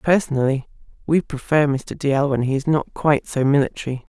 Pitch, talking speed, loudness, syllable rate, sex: 140 Hz, 175 wpm, -20 LUFS, 5.8 syllables/s, female